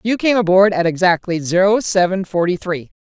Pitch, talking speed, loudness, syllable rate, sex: 185 Hz, 180 wpm, -16 LUFS, 5.3 syllables/s, female